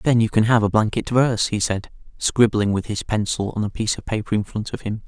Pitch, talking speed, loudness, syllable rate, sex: 110 Hz, 260 wpm, -21 LUFS, 5.9 syllables/s, male